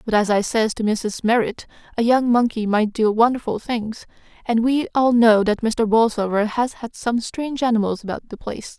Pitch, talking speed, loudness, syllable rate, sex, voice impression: 225 Hz, 200 wpm, -20 LUFS, 5.1 syllables/s, female, very feminine, adult-like, slightly fluent, slightly calm, slightly sweet